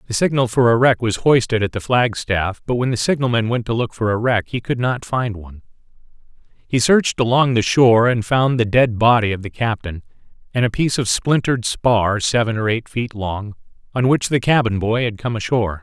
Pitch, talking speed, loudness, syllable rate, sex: 115 Hz, 215 wpm, -18 LUFS, 5.5 syllables/s, male